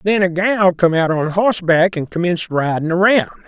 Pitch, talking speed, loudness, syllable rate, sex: 180 Hz, 205 wpm, -16 LUFS, 5.0 syllables/s, male